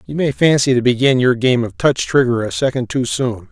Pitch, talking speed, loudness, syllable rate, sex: 125 Hz, 240 wpm, -16 LUFS, 5.3 syllables/s, male